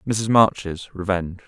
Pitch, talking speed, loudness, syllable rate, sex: 95 Hz, 120 wpm, -20 LUFS, 3.8 syllables/s, male